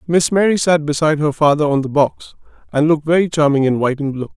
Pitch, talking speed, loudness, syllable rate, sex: 150 Hz, 235 wpm, -16 LUFS, 6.5 syllables/s, male